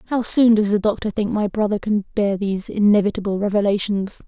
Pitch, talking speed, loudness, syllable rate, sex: 205 Hz, 180 wpm, -19 LUFS, 5.6 syllables/s, female